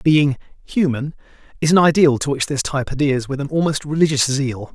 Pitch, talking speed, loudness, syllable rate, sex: 145 Hz, 175 wpm, -18 LUFS, 5.6 syllables/s, male